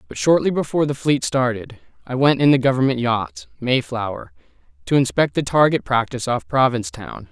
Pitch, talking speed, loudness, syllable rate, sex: 130 Hz, 165 wpm, -19 LUFS, 5.6 syllables/s, male